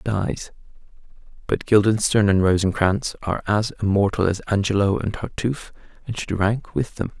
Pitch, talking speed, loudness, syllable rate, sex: 105 Hz, 140 wpm, -21 LUFS, 5.0 syllables/s, male